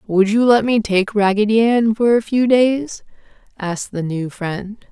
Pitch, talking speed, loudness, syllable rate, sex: 215 Hz, 185 wpm, -16 LUFS, 4.2 syllables/s, female